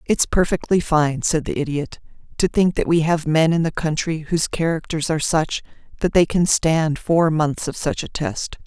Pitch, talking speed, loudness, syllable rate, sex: 160 Hz, 200 wpm, -20 LUFS, 4.8 syllables/s, female